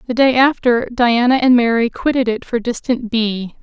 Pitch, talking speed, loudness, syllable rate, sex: 240 Hz, 180 wpm, -15 LUFS, 4.7 syllables/s, female